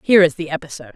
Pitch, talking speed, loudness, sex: 165 Hz, 250 wpm, -18 LUFS, female